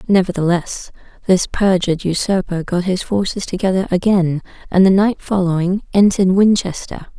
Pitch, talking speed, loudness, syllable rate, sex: 185 Hz, 125 wpm, -16 LUFS, 5.2 syllables/s, female